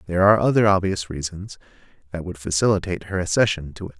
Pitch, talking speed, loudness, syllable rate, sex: 90 Hz, 180 wpm, -21 LUFS, 7.0 syllables/s, male